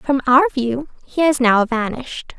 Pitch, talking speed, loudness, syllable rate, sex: 260 Hz, 175 wpm, -17 LUFS, 4.2 syllables/s, female